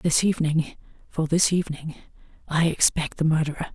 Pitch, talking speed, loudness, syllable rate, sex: 160 Hz, 130 wpm, -23 LUFS, 5.8 syllables/s, female